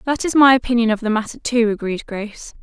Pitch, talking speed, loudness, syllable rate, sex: 230 Hz, 230 wpm, -18 LUFS, 6.2 syllables/s, female